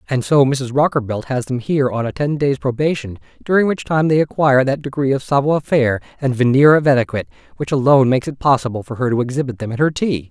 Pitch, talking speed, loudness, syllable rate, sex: 135 Hz, 225 wpm, -17 LUFS, 6.5 syllables/s, male